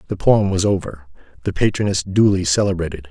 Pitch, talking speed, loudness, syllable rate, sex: 90 Hz, 155 wpm, -18 LUFS, 6.0 syllables/s, male